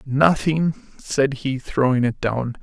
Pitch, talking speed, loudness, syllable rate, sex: 135 Hz, 135 wpm, -21 LUFS, 3.5 syllables/s, male